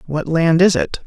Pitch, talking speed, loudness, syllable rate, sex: 155 Hz, 225 wpm, -15 LUFS, 4.5 syllables/s, male